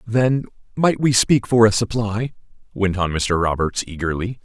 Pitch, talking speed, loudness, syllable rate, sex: 105 Hz, 160 wpm, -19 LUFS, 4.5 syllables/s, male